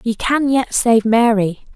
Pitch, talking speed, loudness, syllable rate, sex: 230 Hz, 170 wpm, -15 LUFS, 3.8 syllables/s, female